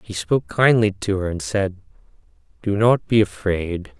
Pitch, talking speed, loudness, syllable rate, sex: 100 Hz, 165 wpm, -20 LUFS, 4.6 syllables/s, male